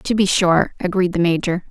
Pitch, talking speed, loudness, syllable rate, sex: 180 Hz, 210 wpm, -17 LUFS, 5.0 syllables/s, female